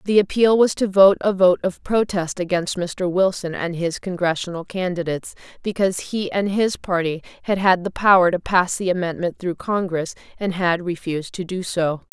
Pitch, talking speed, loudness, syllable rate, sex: 180 Hz, 185 wpm, -20 LUFS, 5.1 syllables/s, female